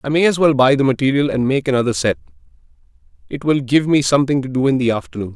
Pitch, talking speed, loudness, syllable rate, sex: 135 Hz, 225 wpm, -16 LUFS, 7.0 syllables/s, male